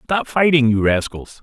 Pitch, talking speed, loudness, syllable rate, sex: 135 Hz, 170 wpm, -16 LUFS, 4.5 syllables/s, male